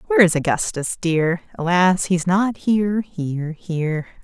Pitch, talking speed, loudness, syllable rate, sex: 180 Hz, 140 wpm, -20 LUFS, 4.5 syllables/s, female